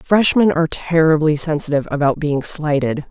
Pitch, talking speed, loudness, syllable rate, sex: 155 Hz, 135 wpm, -17 LUFS, 5.3 syllables/s, female